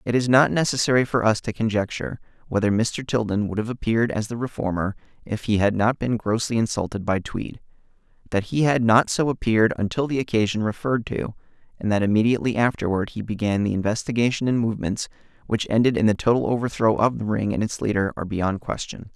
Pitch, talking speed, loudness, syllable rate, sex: 110 Hz, 195 wpm, -23 LUFS, 6.2 syllables/s, male